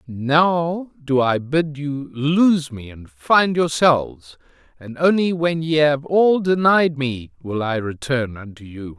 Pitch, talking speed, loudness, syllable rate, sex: 145 Hz, 155 wpm, -19 LUFS, 3.5 syllables/s, male